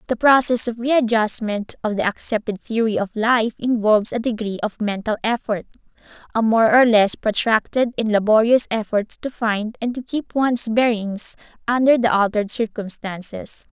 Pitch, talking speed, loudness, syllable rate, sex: 225 Hz, 150 wpm, -19 LUFS, 4.8 syllables/s, female